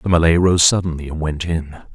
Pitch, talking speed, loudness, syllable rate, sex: 80 Hz, 215 wpm, -17 LUFS, 5.5 syllables/s, male